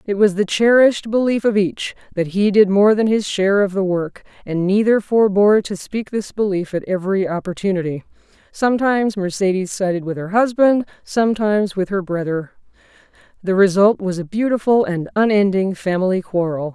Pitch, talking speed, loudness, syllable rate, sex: 195 Hz, 165 wpm, -18 LUFS, 5.4 syllables/s, female